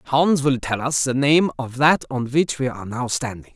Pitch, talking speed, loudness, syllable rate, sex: 130 Hz, 235 wpm, -20 LUFS, 4.8 syllables/s, male